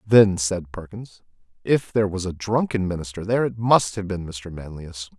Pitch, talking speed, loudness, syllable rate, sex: 100 Hz, 185 wpm, -23 LUFS, 5.0 syllables/s, male